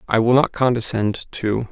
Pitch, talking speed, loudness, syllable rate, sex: 115 Hz, 175 wpm, -19 LUFS, 4.7 syllables/s, male